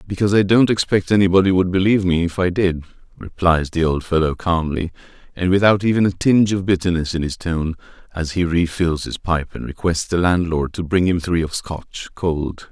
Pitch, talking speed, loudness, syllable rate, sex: 90 Hz, 200 wpm, -18 LUFS, 5.4 syllables/s, male